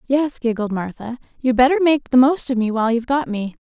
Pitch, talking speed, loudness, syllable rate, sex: 250 Hz, 230 wpm, -18 LUFS, 6.0 syllables/s, female